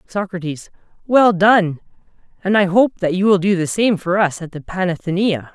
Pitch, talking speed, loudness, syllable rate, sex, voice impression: 185 Hz, 185 wpm, -17 LUFS, 5.0 syllables/s, male, slightly masculine, adult-like, slightly intellectual, slightly calm, slightly strict